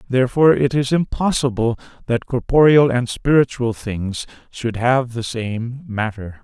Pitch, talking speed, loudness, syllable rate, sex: 125 Hz, 130 wpm, -18 LUFS, 4.4 syllables/s, male